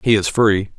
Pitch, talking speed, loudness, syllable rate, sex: 105 Hz, 230 wpm, -16 LUFS, 4.7 syllables/s, male